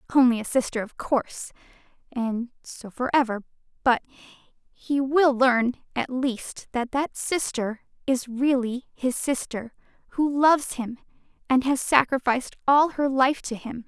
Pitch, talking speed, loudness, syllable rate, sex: 255 Hz, 145 wpm, -24 LUFS, 4.3 syllables/s, female